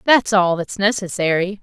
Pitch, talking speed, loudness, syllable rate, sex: 195 Hz, 145 wpm, -18 LUFS, 4.7 syllables/s, female